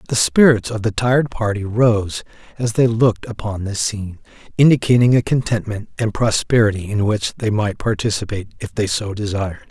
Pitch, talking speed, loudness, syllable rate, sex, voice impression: 110 Hz, 165 wpm, -18 LUFS, 5.5 syllables/s, male, very masculine, very adult-like, slightly old, very thick, tensed, powerful, slightly bright, slightly hard, slightly muffled, fluent, slightly raspy, cool, intellectual, slightly refreshing, sincere, very calm, mature, friendly, reassuring, slightly unique, slightly elegant, wild, slightly lively, kind